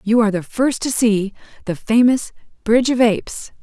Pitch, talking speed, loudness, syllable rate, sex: 225 Hz, 180 wpm, -17 LUFS, 5.0 syllables/s, female